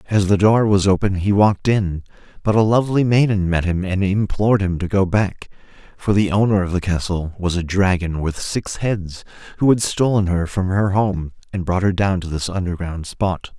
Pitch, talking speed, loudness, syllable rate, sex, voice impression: 95 Hz, 210 wpm, -19 LUFS, 5.0 syllables/s, male, masculine, very adult-like, slightly thick, cool, slightly sincere, slightly calm